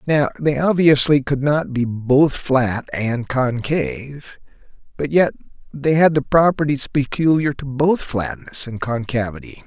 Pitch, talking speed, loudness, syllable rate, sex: 140 Hz, 135 wpm, -18 LUFS, 4.0 syllables/s, male